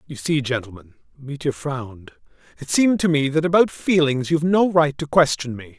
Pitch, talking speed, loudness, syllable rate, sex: 145 Hz, 165 wpm, -20 LUFS, 5.4 syllables/s, male